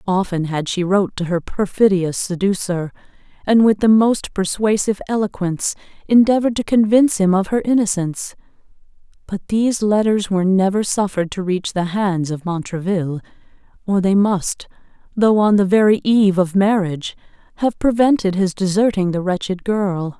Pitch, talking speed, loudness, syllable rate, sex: 195 Hz, 150 wpm, -17 LUFS, 5.3 syllables/s, female